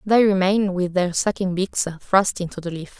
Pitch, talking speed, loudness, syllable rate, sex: 190 Hz, 200 wpm, -21 LUFS, 4.7 syllables/s, female